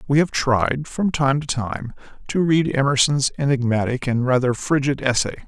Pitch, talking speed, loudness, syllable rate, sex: 135 Hz, 165 wpm, -20 LUFS, 4.8 syllables/s, male